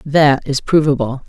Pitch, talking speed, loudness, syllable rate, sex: 140 Hz, 140 wpm, -15 LUFS, 4.3 syllables/s, female